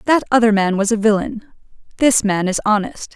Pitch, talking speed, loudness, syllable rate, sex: 220 Hz, 190 wpm, -16 LUFS, 5.4 syllables/s, female